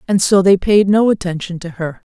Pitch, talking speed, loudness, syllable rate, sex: 185 Hz, 225 wpm, -14 LUFS, 5.3 syllables/s, female